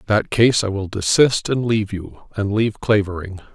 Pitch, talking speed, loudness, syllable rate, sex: 105 Hz, 185 wpm, -19 LUFS, 5.6 syllables/s, male